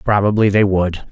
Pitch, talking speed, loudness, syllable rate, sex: 100 Hz, 160 wpm, -15 LUFS, 5.1 syllables/s, male